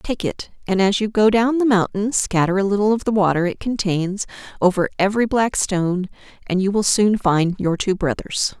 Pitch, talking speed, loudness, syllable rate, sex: 200 Hz, 200 wpm, -19 LUFS, 5.2 syllables/s, female